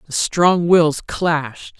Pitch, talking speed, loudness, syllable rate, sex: 160 Hz, 135 wpm, -17 LUFS, 3.1 syllables/s, female